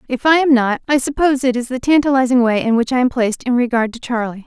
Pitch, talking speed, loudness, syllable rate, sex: 250 Hz, 270 wpm, -16 LUFS, 6.6 syllables/s, female